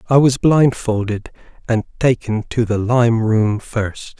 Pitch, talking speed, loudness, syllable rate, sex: 115 Hz, 145 wpm, -17 LUFS, 3.7 syllables/s, male